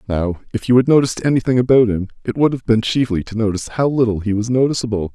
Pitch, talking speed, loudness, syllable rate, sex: 115 Hz, 235 wpm, -17 LUFS, 6.8 syllables/s, male